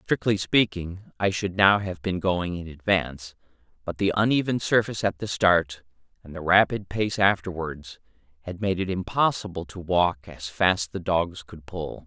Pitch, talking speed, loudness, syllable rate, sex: 90 Hz, 170 wpm, -24 LUFS, 4.5 syllables/s, male